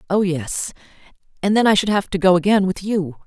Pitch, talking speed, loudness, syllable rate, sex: 185 Hz, 220 wpm, -18 LUFS, 5.7 syllables/s, female